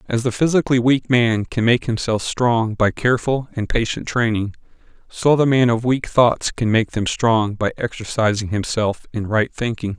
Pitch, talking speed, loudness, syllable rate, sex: 115 Hz, 180 wpm, -19 LUFS, 4.7 syllables/s, male